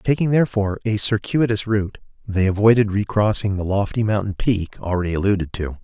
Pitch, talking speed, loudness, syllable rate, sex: 105 Hz, 155 wpm, -20 LUFS, 5.9 syllables/s, male